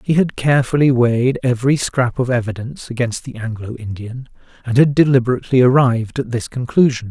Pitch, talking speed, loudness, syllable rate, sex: 125 Hz, 160 wpm, -17 LUFS, 6.0 syllables/s, male